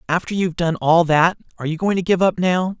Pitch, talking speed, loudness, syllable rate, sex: 175 Hz, 255 wpm, -18 LUFS, 6.2 syllables/s, male